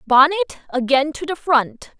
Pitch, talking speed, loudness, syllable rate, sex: 290 Hz, 150 wpm, -18 LUFS, 4.7 syllables/s, female